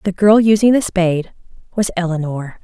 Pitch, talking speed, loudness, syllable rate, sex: 185 Hz, 160 wpm, -15 LUFS, 5.4 syllables/s, female